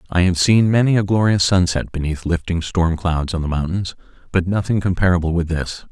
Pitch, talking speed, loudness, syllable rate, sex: 90 Hz, 195 wpm, -18 LUFS, 5.5 syllables/s, male